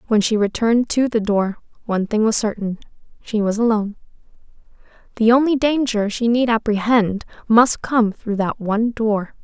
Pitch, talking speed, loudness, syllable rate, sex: 220 Hz, 160 wpm, -18 LUFS, 5.1 syllables/s, female